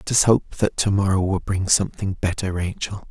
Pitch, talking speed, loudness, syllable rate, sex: 95 Hz, 210 wpm, -21 LUFS, 5.5 syllables/s, male